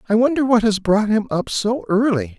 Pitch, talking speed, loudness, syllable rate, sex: 215 Hz, 225 wpm, -18 LUFS, 5.1 syllables/s, male